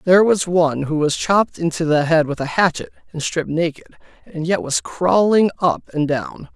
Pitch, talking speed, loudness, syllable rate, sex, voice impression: 165 Hz, 200 wpm, -18 LUFS, 5.3 syllables/s, male, masculine, adult-like, tensed, slightly hard, clear, fluent, intellectual, friendly, slightly light